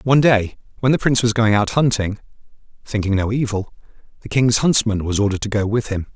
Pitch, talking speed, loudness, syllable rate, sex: 110 Hz, 205 wpm, -18 LUFS, 6.3 syllables/s, male